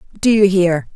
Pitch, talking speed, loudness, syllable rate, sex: 185 Hz, 190 wpm, -14 LUFS, 6.1 syllables/s, female